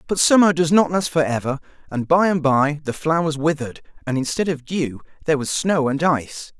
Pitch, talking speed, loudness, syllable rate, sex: 155 Hz, 210 wpm, -20 LUFS, 5.6 syllables/s, male